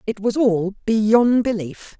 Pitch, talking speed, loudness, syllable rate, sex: 215 Hz, 150 wpm, -19 LUFS, 3.4 syllables/s, female